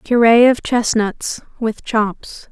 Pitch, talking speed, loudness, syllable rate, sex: 225 Hz, 120 wpm, -16 LUFS, 3.1 syllables/s, female